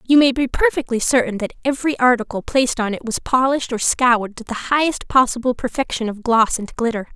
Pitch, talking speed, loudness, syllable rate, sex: 245 Hz, 200 wpm, -18 LUFS, 6.0 syllables/s, female